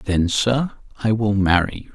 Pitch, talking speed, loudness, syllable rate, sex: 105 Hz, 185 wpm, -20 LUFS, 4.3 syllables/s, male